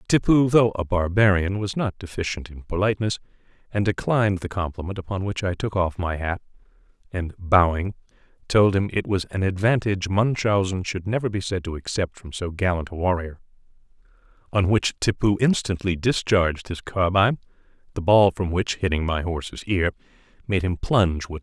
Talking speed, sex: 175 wpm, male